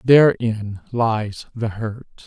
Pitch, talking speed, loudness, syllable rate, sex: 115 Hz, 105 wpm, -20 LUFS, 3.6 syllables/s, male